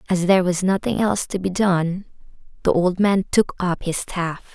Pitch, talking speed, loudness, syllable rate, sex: 185 Hz, 200 wpm, -20 LUFS, 4.8 syllables/s, female